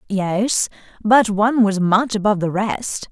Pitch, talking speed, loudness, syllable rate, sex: 210 Hz, 155 wpm, -18 LUFS, 4.3 syllables/s, female